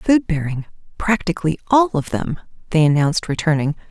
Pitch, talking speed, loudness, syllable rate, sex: 170 Hz, 140 wpm, -19 LUFS, 5.7 syllables/s, female